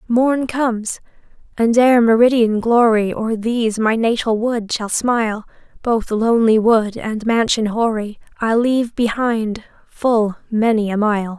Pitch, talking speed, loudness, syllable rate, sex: 225 Hz, 130 wpm, -17 LUFS, 4.2 syllables/s, female